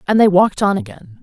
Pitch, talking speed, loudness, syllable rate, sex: 190 Hz, 245 wpm, -15 LUFS, 6.5 syllables/s, female